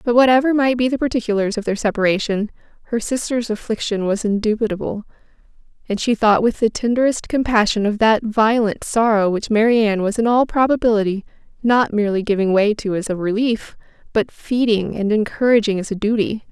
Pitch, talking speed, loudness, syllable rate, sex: 220 Hz, 165 wpm, -18 LUFS, 5.7 syllables/s, female